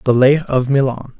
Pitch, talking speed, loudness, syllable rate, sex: 130 Hz, 200 wpm, -15 LUFS, 5.8 syllables/s, male